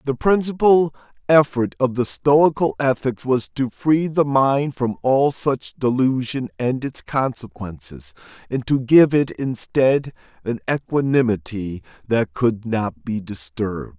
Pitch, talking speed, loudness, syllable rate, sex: 130 Hz, 135 wpm, -20 LUFS, 3.9 syllables/s, male